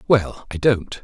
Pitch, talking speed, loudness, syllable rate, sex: 105 Hz, 175 wpm, -20 LUFS, 4.1 syllables/s, male